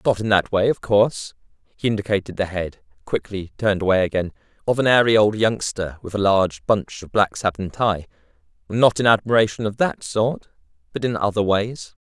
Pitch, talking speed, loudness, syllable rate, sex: 100 Hz, 180 wpm, -20 LUFS, 5.4 syllables/s, male